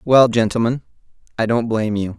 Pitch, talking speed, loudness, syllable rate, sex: 115 Hz, 165 wpm, -18 LUFS, 5.8 syllables/s, male